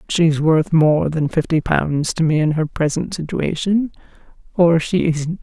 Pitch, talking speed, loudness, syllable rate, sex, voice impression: 160 Hz, 165 wpm, -18 LUFS, 4.1 syllables/s, female, feminine, adult-like, slightly muffled, slightly intellectual, calm, slightly sweet